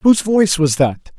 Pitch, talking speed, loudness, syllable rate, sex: 170 Hz, 205 wpm, -15 LUFS, 5.4 syllables/s, male